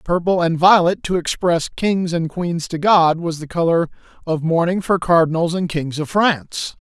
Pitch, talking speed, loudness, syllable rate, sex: 170 Hz, 185 wpm, -18 LUFS, 4.7 syllables/s, male